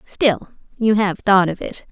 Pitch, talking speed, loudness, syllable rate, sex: 205 Hz, 190 wpm, -18 LUFS, 4.0 syllables/s, female